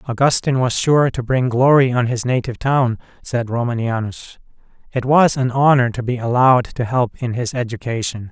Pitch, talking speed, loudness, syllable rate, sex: 125 Hz, 175 wpm, -17 LUFS, 5.3 syllables/s, male